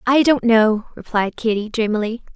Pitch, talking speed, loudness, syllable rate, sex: 225 Hz, 155 wpm, -18 LUFS, 4.8 syllables/s, female